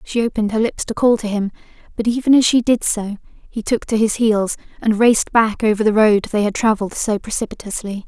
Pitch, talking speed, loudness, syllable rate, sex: 215 Hz, 225 wpm, -17 LUFS, 5.7 syllables/s, female